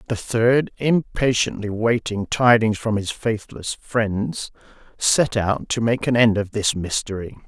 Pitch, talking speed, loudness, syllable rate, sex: 110 Hz, 145 wpm, -21 LUFS, 3.9 syllables/s, male